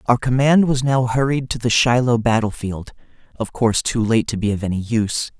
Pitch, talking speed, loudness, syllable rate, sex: 120 Hz, 200 wpm, -18 LUFS, 5.5 syllables/s, male